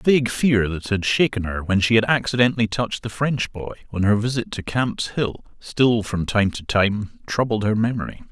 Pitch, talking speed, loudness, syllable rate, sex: 110 Hz, 210 wpm, -21 LUFS, 5.2 syllables/s, male